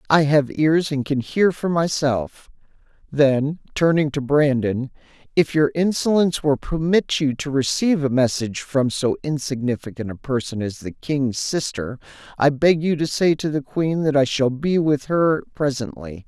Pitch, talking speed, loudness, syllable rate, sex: 145 Hz, 170 wpm, -20 LUFS, 4.5 syllables/s, male